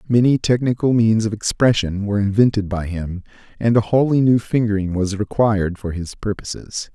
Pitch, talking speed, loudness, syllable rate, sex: 105 Hz, 165 wpm, -19 LUFS, 5.3 syllables/s, male